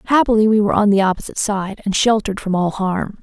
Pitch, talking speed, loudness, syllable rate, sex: 205 Hz, 225 wpm, -17 LUFS, 6.7 syllables/s, female